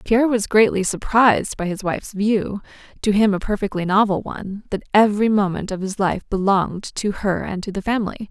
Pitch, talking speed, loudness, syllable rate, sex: 205 Hz, 195 wpm, -20 LUFS, 5.6 syllables/s, female